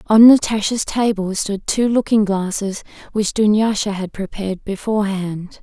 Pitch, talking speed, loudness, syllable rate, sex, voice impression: 205 Hz, 130 wpm, -18 LUFS, 4.6 syllables/s, female, very feminine, slightly young, slightly adult-like, thin, relaxed, very weak, dark, very soft, slightly muffled, slightly fluent, raspy, very cute, intellectual, slightly refreshing, sincere, very calm, very friendly, reassuring, very unique, elegant, slightly wild, very sweet, kind, very modest